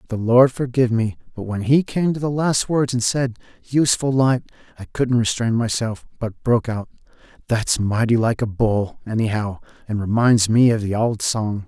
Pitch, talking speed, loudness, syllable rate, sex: 115 Hz, 185 wpm, -20 LUFS, 5.0 syllables/s, male